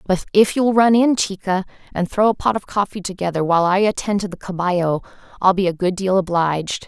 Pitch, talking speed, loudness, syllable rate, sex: 190 Hz, 220 wpm, -18 LUFS, 5.9 syllables/s, female